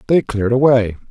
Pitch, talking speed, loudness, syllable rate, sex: 120 Hz, 165 wpm, -15 LUFS, 6.2 syllables/s, male